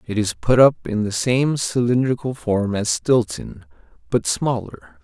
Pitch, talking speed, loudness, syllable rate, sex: 115 Hz, 155 wpm, -20 LUFS, 4.0 syllables/s, male